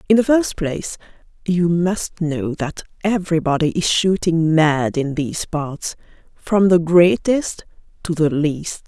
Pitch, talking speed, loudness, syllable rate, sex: 170 Hz, 140 wpm, -18 LUFS, 4.0 syllables/s, female